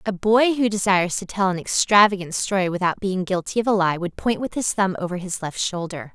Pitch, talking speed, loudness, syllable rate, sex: 190 Hz, 235 wpm, -21 LUFS, 5.7 syllables/s, female